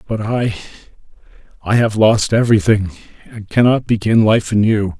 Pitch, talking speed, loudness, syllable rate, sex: 105 Hz, 120 wpm, -15 LUFS, 5.4 syllables/s, male